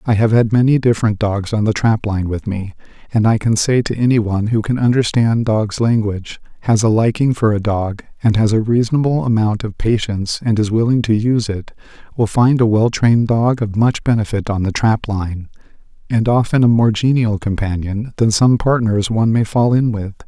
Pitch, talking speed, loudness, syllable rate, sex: 110 Hz, 205 wpm, -16 LUFS, 5.4 syllables/s, male